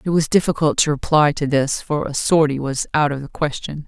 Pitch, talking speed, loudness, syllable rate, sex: 150 Hz, 230 wpm, -19 LUFS, 5.4 syllables/s, female